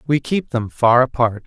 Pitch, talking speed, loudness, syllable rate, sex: 125 Hz, 205 wpm, -17 LUFS, 4.6 syllables/s, male